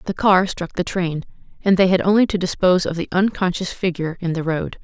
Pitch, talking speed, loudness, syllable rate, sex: 180 Hz, 225 wpm, -19 LUFS, 5.9 syllables/s, female